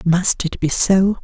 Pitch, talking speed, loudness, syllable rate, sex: 180 Hz, 195 wpm, -16 LUFS, 3.6 syllables/s, female